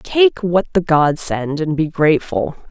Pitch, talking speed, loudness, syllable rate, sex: 160 Hz, 180 wpm, -16 LUFS, 4.1 syllables/s, female